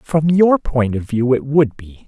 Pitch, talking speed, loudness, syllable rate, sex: 135 Hz, 230 wpm, -16 LUFS, 3.9 syllables/s, male